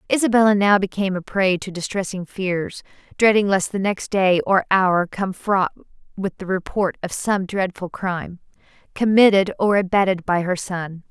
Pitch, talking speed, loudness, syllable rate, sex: 190 Hz, 160 wpm, -20 LUFS, 4.8 syllables/s, female